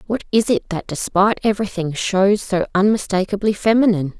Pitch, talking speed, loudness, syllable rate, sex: 200 Hz, 145 wpm, -18 LUFS, 5.7 syllables/s, female